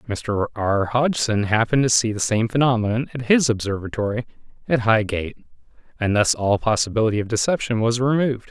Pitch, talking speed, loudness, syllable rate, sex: 115 Hz, 155 wpm, -20 LUFS, 5.8 syllables/s, male